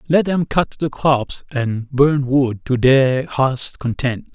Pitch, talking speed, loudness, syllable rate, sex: 135 Hz, 165 wpm, -18 LUFS, 3.2 syllables/s, male